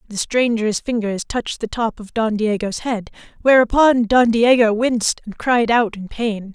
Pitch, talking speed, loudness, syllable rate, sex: 225 Hz, 175 wpm, -18 LUFS, 4.5 syllables/s, female